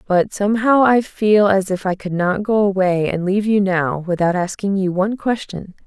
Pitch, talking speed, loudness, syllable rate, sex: 195 Hz, 205 wpm, -17 LUFS, 5.0 syllables/s, female